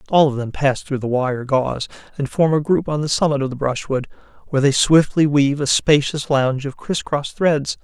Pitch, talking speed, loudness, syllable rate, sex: 140 Hz, 220 wpm, -19 LUFS, 5.4 syllables/s, male